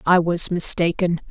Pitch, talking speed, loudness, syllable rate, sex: 175 Hz, 140 wpm, -18 LUFS, 4.4 syllables/s, female